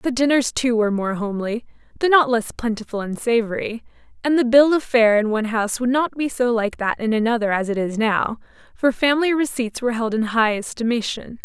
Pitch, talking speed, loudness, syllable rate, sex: 235 Hz, 210 wpm, -20 LUFS, 5.7 syllables/s, female